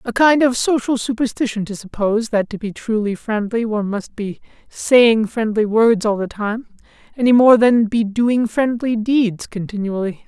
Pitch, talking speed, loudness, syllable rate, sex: 225 Hz, 170 wpm, -17 LUFS, 4.7 syllables/s, male